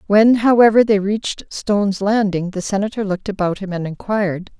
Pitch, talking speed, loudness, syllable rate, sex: 200 Hz, 170 wpm, -17 LUFS, 5.5 syllables/s, female